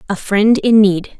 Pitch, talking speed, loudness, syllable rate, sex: 205 Hz, 200 wpm, -13 LUFS, 4.0 syllables/s, female